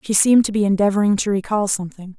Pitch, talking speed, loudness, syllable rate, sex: 200 Hz, 220 wpm, -18 LUFS, 7.2 syllables/s, female